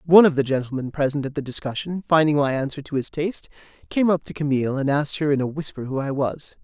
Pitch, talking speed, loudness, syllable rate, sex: 145 Hz, 245 wpm, -22 LUFS, 6.7 syllables/s, male